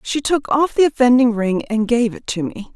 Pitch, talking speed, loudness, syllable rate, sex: 240 Hz, 240 wpm, -17 LUFS, 5.0 syllables/s, female